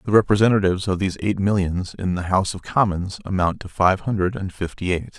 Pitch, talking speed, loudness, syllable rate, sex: 95 Hz, 210 wpm, -21 LUFS, 6.2 syllables/s, male